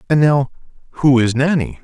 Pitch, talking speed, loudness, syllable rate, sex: 140 Hz, 165 wpm, -15 LUFS, 5.3 syllables/s, male